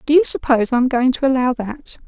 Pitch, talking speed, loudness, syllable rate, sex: 260 Hz, 230 wpm, -17 LUFS, 5.9 syllables/s, female